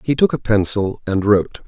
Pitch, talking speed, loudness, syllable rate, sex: 110 Hz, 215 wpm, -17 LUFS, 5.3 syllables/s, male